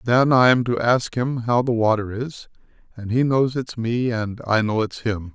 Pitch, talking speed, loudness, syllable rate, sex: 120 Hz, 225 wpm, -21 LUFS, 4.5 syllables/s, male